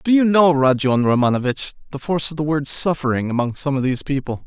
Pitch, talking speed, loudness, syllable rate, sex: 145 Hz, 215 wpm, -18 LUFS, 6.2 syllables/s, male